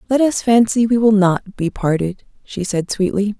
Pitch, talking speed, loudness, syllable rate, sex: 205 Hz, 195 wpm, -17 LUFS, 4.7 syllables/s, female